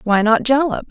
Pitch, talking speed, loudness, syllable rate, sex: 235 Hz, 200 wpm, -15 LUFS, 5.1 syllables/s, female